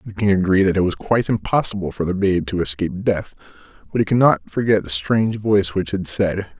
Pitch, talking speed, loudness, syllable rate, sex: 95 Hz, 225 wpm, -19 LUFS, 6.0 syllables/s, male